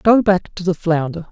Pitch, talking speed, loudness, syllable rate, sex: 180 Hz, 230 wpm, -17 LUFS, 4.7 syllables/s, male